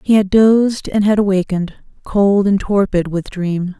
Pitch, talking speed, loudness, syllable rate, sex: 195 Hz, 175 wpm, -15 LUFS, 4.8 syllables/s, female